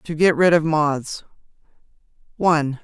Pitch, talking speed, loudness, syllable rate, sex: 155 Hz, 125 wpm, -18 LUFS, 4.2 syllables/s, female